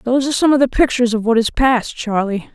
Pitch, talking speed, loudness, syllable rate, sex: 245 Hz, 260 wpm, -16 LUFS, 6.8 syllables/s, female